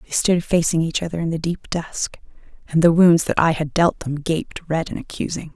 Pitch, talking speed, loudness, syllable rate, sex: 165 Hz, 225 wpm, -20 LUFS, 5.2 syllables/s, female